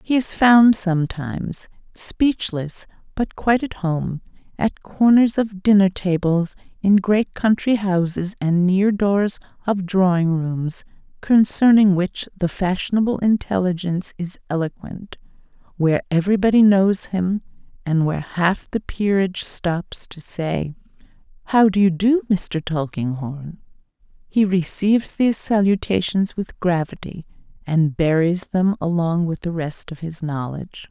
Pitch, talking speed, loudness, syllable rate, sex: 185 Hz, 125 wpm, -20 LUFS, 4.2 syllables/s, female